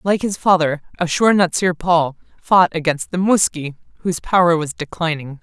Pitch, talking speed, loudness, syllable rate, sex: 170 Hz, 155 wpm, -17 LUFS, 5.0 syllables/s, female